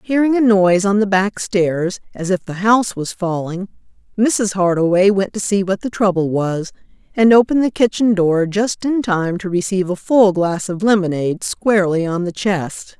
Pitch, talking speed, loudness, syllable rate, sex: 195 Hz, 190 wpm, -16 LUFS, 4.8 syllables/s, female